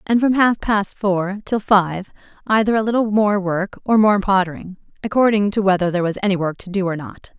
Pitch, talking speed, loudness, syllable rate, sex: 200 Hz, 210 wpm, -18 LUFS, 5.4 syllables/s, female